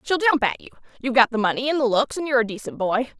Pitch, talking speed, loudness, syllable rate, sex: 250 Hz, 300 wpm, -21 LUFS, 7.6 syllables/s, female